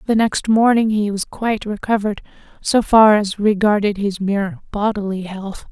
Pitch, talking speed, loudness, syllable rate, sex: 205 Hz, 155 wpm, -17 LUFS, 4.9 syllables/s, female